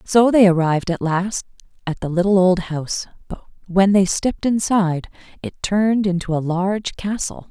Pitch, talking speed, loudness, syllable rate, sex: 190 Hz, 170 wpm, -19 LUFS, 5.2 syllables/s, female